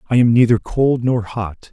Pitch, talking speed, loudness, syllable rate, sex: 115 Hz, 210 wpm, -16 LUFS, 4.7 syllables/s, male